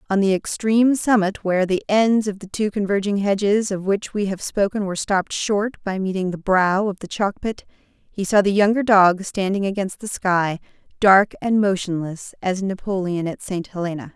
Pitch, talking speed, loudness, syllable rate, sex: 200 Hz, 185 wpm, -20 LUFS, 4.9 syllables/s, female